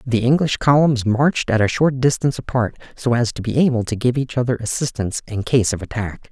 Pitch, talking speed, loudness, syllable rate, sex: 120 Hz, 220 wpm, -19 LUFS, 5.9 syllables/s, male